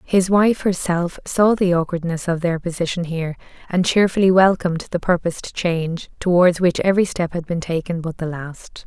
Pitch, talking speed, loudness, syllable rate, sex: 175 Hz, 175 wpm, -19 LUFS, 5.2 syllables/s, female